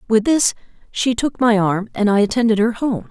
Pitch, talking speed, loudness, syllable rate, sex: 220 Hz, 210 wpm, -17 LUFS, 5.2 syllables/s, female